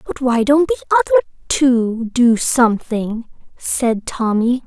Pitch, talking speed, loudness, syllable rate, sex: 250 Hz, 130 wpm, -16 LUFS, 3.9 syllables/s, female